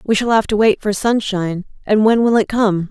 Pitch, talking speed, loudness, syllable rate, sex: 210 Hz, 250 wpm, -16 LUFS, 5.3 syllables/s, female